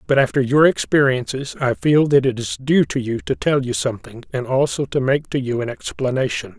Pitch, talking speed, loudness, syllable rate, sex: 130 Hz, 220 wpm, -19 LUFS, 5.4 syllables/s, male